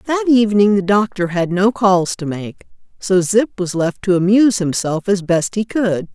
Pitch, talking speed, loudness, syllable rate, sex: 195 Hz, 195 wpm, -16 LUFS, 4.6 syllables/s, female